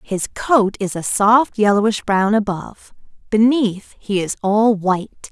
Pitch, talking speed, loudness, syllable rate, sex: 210 Hz, 145 wpm, -17 LUFS, 4.0 syllables/s, female